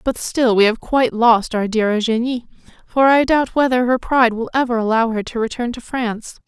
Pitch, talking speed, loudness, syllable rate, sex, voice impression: 235 Hz, 215 wpm, -17 LUFS, 5.4 syllables/s, female, feminine, adult-like, powerful, bright, slightly fluent, intellectual, elegant, lively, sharp